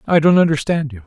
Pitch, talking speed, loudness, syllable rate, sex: 150 Hz, 225 wpm, -15 LUFS, 6.6 syllables/s, male